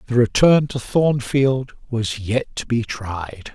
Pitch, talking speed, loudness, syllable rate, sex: 120 Hz, 150 wpm, -20 LUFS, 3.5 syllables/s, male